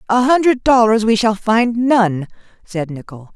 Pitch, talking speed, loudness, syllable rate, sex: 220 Hz, 160 wpm, -14 LUFS, 4.3 syllables/s, female